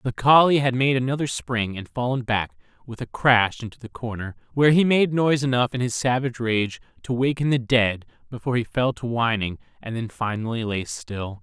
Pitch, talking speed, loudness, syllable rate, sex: 120 Hz, 200 wpm, -22 LUFS, 5.4 syllables/s, male